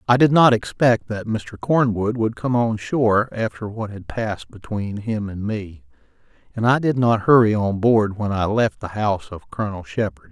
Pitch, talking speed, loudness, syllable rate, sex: 110 Hz, 200 wpm, -20 LUFS, 4.8 syllables/s, male